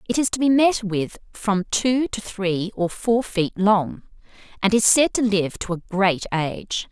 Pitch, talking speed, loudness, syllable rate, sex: 205 Hz, 200 wpm, -21 LUFS, 4.1 syllables/s, female